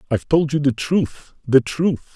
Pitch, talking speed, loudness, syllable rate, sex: 145 Hz, 195 wpm, -19 LUFS, 4.4 syllables/s, male